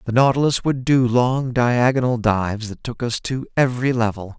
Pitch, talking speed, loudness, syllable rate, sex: 120 Hz, 180 wpm, -19 LUFS, 5.1 syllables/s, male